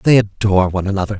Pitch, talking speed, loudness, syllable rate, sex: 100 Hz, 200 wpm, -16 LUFS, 7.8 syllables/s, male